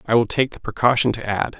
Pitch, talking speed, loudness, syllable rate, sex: 115 Hz, 265 wpm, -20 LUFS, 6.2 syllables/s, male